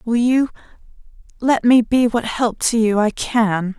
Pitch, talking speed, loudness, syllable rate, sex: 230 Hz, 175 wpm, -17 LUFS, 3.9 syllables/s, female